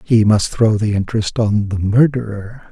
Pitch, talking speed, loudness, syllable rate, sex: 110 Hz, 175 wpm, -16 LUFS, 4.7 syllables/s, male